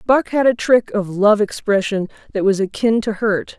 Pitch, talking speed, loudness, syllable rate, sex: 210 Hz, 200 wpm, -17 LUFS, 4.6 syllables/s, female